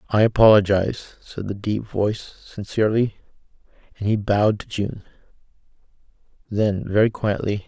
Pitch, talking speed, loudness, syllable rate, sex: 105 Hz, 110 wpm, -21 LUFS, 5.1 syllables/s, male